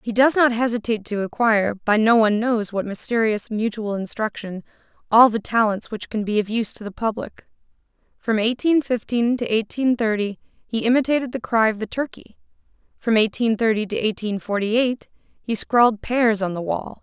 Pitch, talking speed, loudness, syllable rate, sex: 225 Hz, 180 wpm, -21 LUFS, 5.2 syllables/s, female